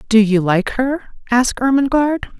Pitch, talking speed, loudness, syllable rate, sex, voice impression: 245 Hz, 150 wpm, -16 LUFS, 5.1 syllables/s, female, very feminine, adult-like, slightly intellectual, friendly, slightly reassuring, slightly elegant